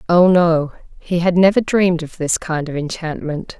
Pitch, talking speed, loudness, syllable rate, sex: 170 Hz, 185 wpm, -17 LUFS, 4.8 syllables/s, female